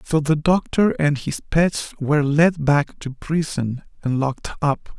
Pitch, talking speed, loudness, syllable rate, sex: 150 Hz, 170 wpm, -20 LUFS, 4.0 syllables/s, male